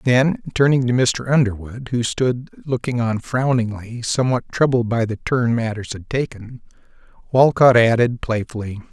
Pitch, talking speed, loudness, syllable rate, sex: 120 Hz, 140 wpm, -19 LUFS, 4.8 syllables/s, male